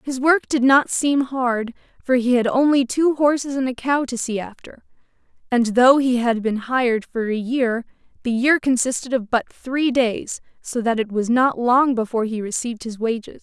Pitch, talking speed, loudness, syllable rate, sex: 245 Hz, 200 wpm, -20 LUFS, 4.8 syllables/s, female